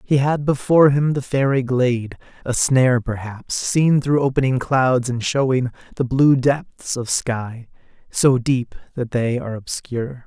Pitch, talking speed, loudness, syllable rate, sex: 130 Hz, 160 wpm, -19 LUFS, 4.3 syllables/s, male